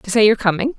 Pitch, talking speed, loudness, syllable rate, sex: 215 Hz, 305 wpm, -16 LUFS, 8.2 syllables/s, female